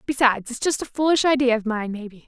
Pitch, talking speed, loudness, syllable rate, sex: 245 Hz, 235 wpm, -21 LUFS, 6.6 syllables/s, female